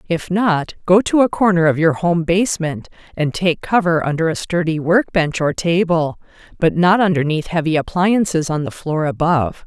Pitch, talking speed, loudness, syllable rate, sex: 170 Hz, 175 wpm, -17 LUFS, 3.5 syllables/s, female